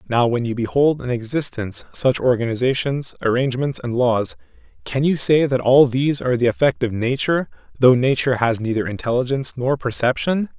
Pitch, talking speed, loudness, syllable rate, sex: 125 Hz, 165 wpm, -19 LUFS, 5.7 syllables/s, male